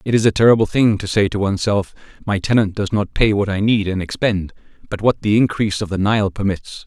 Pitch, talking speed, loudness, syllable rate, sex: 105 Hz, 245 wpm, -18 LUFS, 5.9 syllables/s, male